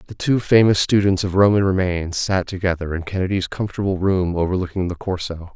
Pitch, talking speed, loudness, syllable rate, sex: 95 Hz, 175 wpm, -19 LUFS, 5.8 syllables/s, male